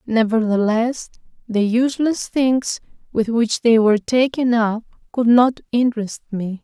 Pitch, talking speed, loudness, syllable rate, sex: 230 Hz, 125 wpm, -18 LUFS, 4.3 syllables/s, female